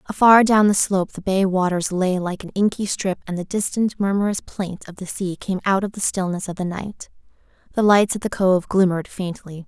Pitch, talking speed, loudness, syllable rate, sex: 190 Hz, 215 wpm, -20 LUFS, 5.4 syllables/s, female